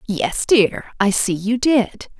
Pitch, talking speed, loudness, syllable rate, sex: 215 Hz, 165 wpm, -18 LUFS, 3.3 syllables/s, female